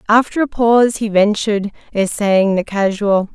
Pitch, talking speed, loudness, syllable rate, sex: 210 Hz, 145 wpm, -15 LUFS, 4.8 syllables/s, female